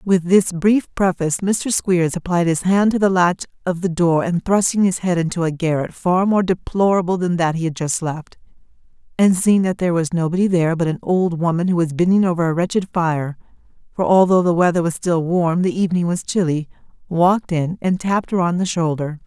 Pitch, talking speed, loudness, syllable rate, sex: 175 Hz, 210 wpm, -18 LUFS, 4.7 syllables/s, female